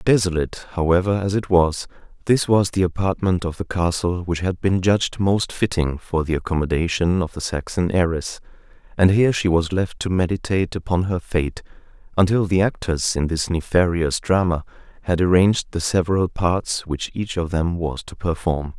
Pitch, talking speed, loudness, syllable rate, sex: 90 Hz, 170 wpm, -21 LUFS, 5.1 syllables/s, male